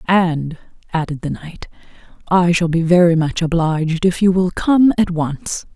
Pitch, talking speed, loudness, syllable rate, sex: 170 Hz, 165 wpm, -16 LUFS, 4.3 syllables/s, female